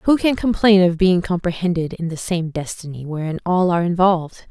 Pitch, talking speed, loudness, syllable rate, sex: 175 Hz, 185 wpm, -19 LUFS, 5.4 syllables/s, female